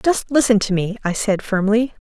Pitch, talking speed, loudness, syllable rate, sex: 220 Hz, 200 wpm, -18 LUFS, 5.0 syllables/s, female